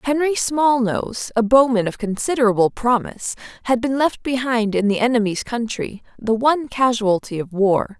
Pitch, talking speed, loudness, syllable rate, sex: 235 Hz, 150 wpm, -19 LUFS, 5.1 syllables/s, female